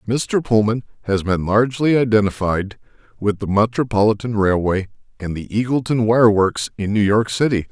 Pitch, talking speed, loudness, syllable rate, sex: 110 Hz, 150 wpm, -18 LUFS, 5.0 syllables/s, male